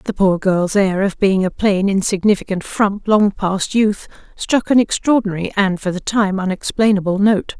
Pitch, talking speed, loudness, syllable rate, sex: 200 Hz, 175 wpm, -16 LUFS, 4.7 syllables/s, female